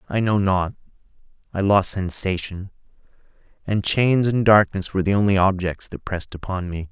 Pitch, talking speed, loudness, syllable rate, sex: 95 Hz, 155 wpm, -20 LUFS, 5.2 syllables/s, male